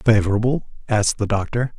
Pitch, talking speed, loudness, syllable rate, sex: 110 Hz, 135 wpm, -20 LUFS, 6.4 syllables/s, male